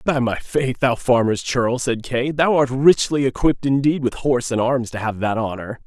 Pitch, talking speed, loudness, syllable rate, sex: 125 Hz, 215 wpm, -19 LUFS, 4.9 syllables/s, male